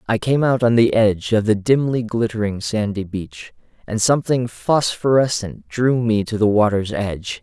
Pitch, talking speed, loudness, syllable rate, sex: 110 Hz, 170 wpm, -18 LUFS, 4.8 syllables/s, male